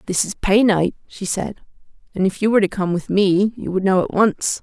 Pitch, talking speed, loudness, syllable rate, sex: 195 Hz, 245 wpm, -18 LUFS, 5.3 syllables/s, female